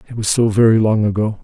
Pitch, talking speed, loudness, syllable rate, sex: 110 Hz, 250 wpm, -15 LUFS, 6.5 syllables/s, male